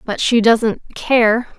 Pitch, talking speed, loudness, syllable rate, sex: 230 Hz, 115 wpm, -15 LUFS, 3.1 syllables/s, female